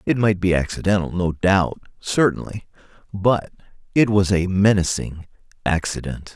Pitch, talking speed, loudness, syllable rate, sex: 95 Hz, 125 wpm, -20 LUFS, 4.6 syllables/s, male